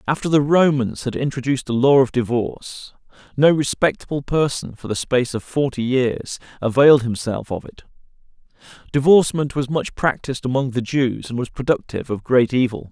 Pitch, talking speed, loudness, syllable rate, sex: 130 Hz, 165 wpm, -19 LUFS, 5.5 syllables/s, male